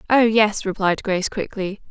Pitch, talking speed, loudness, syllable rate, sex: 205 Hz, 155 wpm, -20 LUFS, 4.9 syllables/s, female